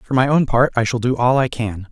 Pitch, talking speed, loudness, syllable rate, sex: 120 Hz, 315 wpm, -17 LUFS, 5.5 syllables/s, male